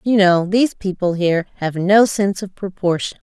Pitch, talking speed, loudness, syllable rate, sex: 190 Hz, 180 wpm, -17 LUFS, 5.4 syllables/s, female